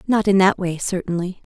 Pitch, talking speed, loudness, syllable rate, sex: 185 Hz, 195 wpm, -19 LUFS, 5.3 syllables/s, female